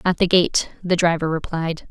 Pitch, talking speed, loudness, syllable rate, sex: 170 Hz, 190 wpm, -20 LUFS, 4.7 syllables/s, female